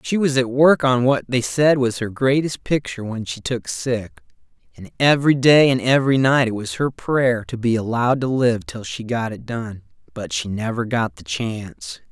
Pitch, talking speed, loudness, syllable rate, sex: 120 Hz, 210 wpm, -19 LUFS, 4.8 syllables/s, male